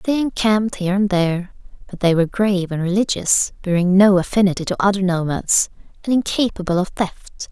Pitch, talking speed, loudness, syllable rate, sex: 190 Hz, 170 wpm, -18 LUFS, 5.8 syllables/s, female